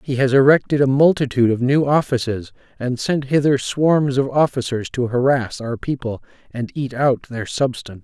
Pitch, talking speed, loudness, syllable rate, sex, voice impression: 130 Hz, 170 wpm, -18 LUFS, 5.0 syllables/s, male, masculine, middle-aged, slightly thick, sincere, slightly calm, slightly friendly